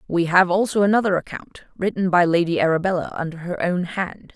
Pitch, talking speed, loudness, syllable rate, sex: 180 Hz, 180 wpm, -20 LUFS, 5.8 syllables/s, female